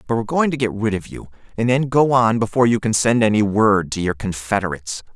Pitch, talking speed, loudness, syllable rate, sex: 110 Hz, 245 wpm, -18 LUFS, 6.3 syllables/s, male